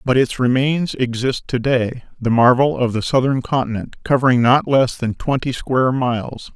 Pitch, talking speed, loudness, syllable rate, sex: 125 Hz, 175 wpm, -18 LUFS, 4.9 syllables/s, male